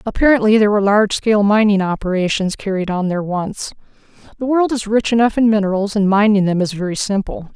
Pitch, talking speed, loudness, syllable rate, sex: 205 Hz, 190 wpm, -16 LUFS, 6.4 syllables/s, female